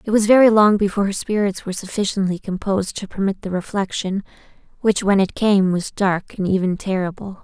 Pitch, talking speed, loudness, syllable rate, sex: 195 Hz, 185 wpm, -19 LUFS, 5.8 syllables/s, female